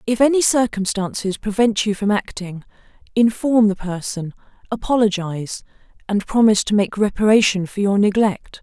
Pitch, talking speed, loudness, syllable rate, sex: 210 Hz, 130 wpm, -18 LUFS, 5.2 syllables/s, female